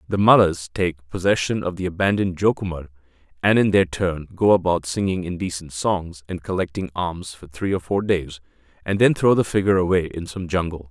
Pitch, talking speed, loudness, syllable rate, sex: 90 Hz, 185 wpm, -21 LUFS, 5.6 syllables/s, male